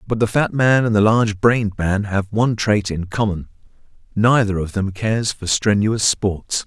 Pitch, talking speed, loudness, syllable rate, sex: 105 Hz, 190 wpm, -18 LUFS, 4.8 syllables/s, male